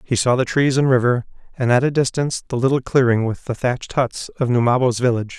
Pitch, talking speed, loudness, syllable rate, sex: 125 Hz, 225 wpm, -19 LUFS, 6.3 syllables/s, male